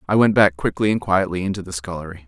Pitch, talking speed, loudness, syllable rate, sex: 95 Hz, 235 wpm, -19 LUFS, 6.7 syllables/s, male